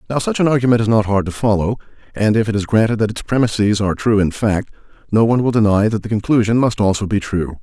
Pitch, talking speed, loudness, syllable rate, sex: 110 Hz, 250 wpm, -16 LUFS, 6.7 syllables/s, male